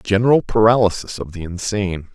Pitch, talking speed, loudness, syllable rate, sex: 100 Hz, 140 wpm, -18 LUFS, 5.8 syllables/s, male